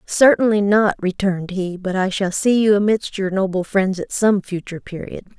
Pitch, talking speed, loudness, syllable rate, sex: 195 Hz, 190 wpm, -18 LUFS, 5.1 syllables/s, female